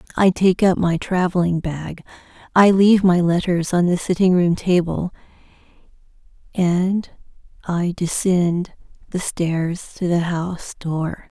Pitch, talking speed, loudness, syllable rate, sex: 175 Hz, 125 wpm, -19 LUFS, 4.0 syllables/s, female